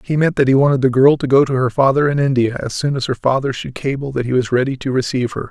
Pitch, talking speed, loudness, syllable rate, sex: 130 Hz, 305 wpm, -16 LUFS, 6.7 syllables/s, male